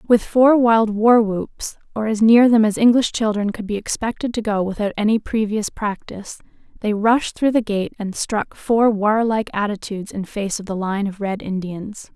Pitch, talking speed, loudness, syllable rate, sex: 215 Hz, 195 wpm, -19 LUFS, 4.8 syllables/s, female